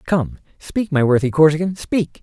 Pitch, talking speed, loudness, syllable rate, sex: 160 Hz, 160 wpm, -18 LUFS, 4.8 syllables/s, male